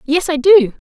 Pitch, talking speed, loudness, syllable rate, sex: 310 Hz, 205 wpm, -12 LUFS, 4.4 syllables/s, female